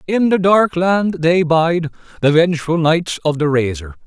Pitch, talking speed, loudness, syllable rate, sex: 165 Hz, 175 wpm, -15 LUFS, 4.4 syllables/s, male